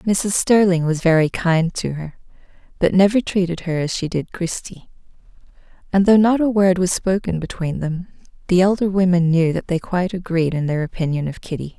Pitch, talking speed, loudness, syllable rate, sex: 180 Hz, 190 wpm, -19 LUFS, 5.3 syllables/s, female